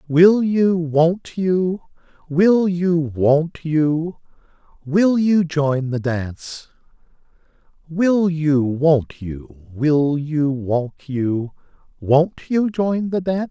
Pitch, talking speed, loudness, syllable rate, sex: 160 Hz, 115 wpm, -19 LUFS, 2.6 syllables/s, male